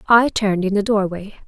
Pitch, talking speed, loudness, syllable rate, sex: 205 Hz, 205 wpm, -18 LUFS, 5.6 syllables/s, female